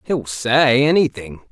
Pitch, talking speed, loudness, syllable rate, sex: 130 Hz, 120 wpm, -16 LUFS, 3.6 syllables/s, male